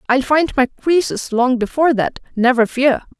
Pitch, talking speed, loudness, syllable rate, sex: 265 Hz, 170 wpm, -16 LUFS, 4.8 syllables/s, female